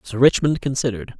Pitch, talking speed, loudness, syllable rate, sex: 125 Hz, 150 wpm, -19 LUFS, 6.6 syllables/s, male